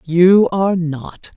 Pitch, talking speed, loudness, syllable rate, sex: 175 Hz, 130 wpm, -14 LUFS, 3.4 syllables/s, female